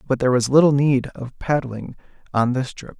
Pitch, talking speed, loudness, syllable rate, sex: 130 Hz, 200 wpm, -19 LUFS, 5.3 syllables/s, male